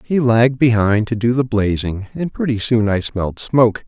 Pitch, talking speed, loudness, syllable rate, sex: 115 Hz, 200 wpm, -17 LUFS, 4.9 syllables/s, male